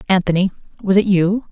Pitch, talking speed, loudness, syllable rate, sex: 190 Hz, 160 wpm, -16 LUFS, 6.1 syllables/s, female